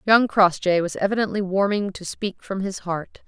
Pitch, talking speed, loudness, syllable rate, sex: 195 Hz, 185 wpm, -22 LUFS, 4.9 syllables/s, female